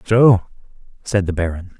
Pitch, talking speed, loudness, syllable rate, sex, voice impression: 100 Hz, 135 wpm, -17 LUFS, 4.4 syllables/s, male, very masculine, very adult-like, very thick, slightly relaxed, very powerful, slightly dark, slightly soft, muffled, fluent, cool, very intellectual, slightly refreshing, slightly sincere, very calm, mature, very friendly, reassuring, unique, very elegant, wild, sweet, slightly lively, kind, slightly modest